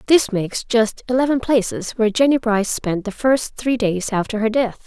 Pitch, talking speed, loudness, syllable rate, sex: 230 Hz, 195 wpm, -19 LUFS, 5.2 syllables/s, female